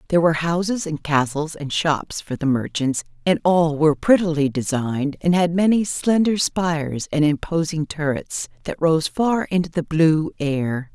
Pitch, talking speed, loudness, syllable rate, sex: 160 Hz, 165 wpm, -20 LUFS, 4.6 syllables/s, female